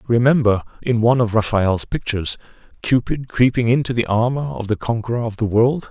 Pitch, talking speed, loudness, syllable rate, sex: 115 Hz, 175 wpm, -19 LUFS, 5.6 syllables/s, male